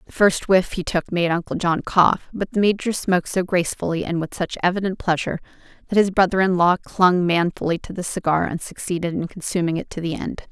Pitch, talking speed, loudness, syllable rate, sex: 180 Hz, 215 wpm, -21 LUFS, 5.9 syllables/s, female